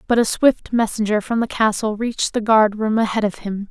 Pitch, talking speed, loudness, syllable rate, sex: 215 Hz, 225 wpm, -19 LUFS, 5.4 syllables/s, female